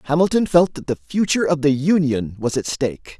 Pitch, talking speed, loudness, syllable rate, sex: 150 Hz, 205 wpm, -19 LUFS, 5.7 syllables/s, male